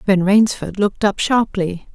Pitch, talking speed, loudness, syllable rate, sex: 200 Hz, 155 wpm, -17 LUFS, 4.4 syllables/s, female